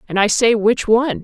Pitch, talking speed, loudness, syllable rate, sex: 225 Hz, 245 wpm, -15 LUFS, 5.6 syllables/s, female